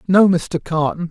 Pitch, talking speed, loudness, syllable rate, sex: 170 Hz, 160 wpm, -17 LUFS, 4.1 syllables/s, male